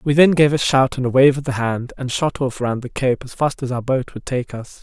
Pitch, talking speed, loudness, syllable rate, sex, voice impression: 130 Hz, 310 wpm, -19 LUFS, 5.3 syllables/s, male, masculine, adult-like, tensed, hard, clear, fluent, intellectual, sincere, slightly wild, strict